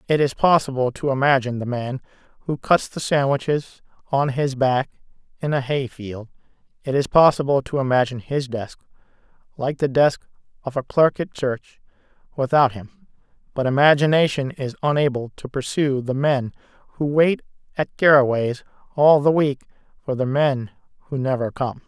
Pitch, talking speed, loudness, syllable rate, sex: 135 Hz, 150 wpm, -20 LUFS, 5.0 syllables/s, male